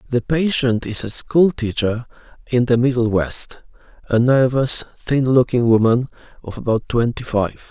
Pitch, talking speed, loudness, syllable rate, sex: 120 Hz, 150 wpm, -18 LUFS, 4.5 syllables/s, male